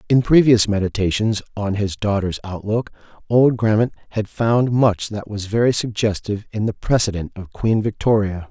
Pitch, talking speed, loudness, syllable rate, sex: 105 Hz, 155 wpm, -19 LUFS, 4.9 syllables/s, male